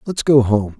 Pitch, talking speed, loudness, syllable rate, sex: 125 Hz, 225 wpm, -15 LUFS, 4.5 syllables/s, male